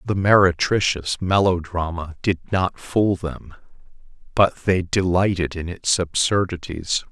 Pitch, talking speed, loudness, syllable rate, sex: 90 Hz, 110 wpm, -21 LUFS, 4.0 syllables/s, male